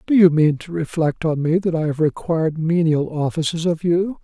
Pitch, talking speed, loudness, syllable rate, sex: 165 Hz, 210 wpm, -19 LUFS, 5.1 syllables/s, male